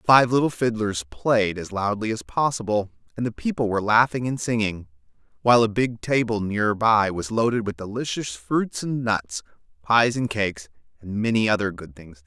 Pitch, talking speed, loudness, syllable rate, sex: 110 Hz, 185 wpm, -23 LUFS, 5.2 syllables/s, male